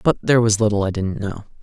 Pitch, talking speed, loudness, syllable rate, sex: 105 Hz, 260 wpm, -19 LUFS, 6.7 syllables/s, male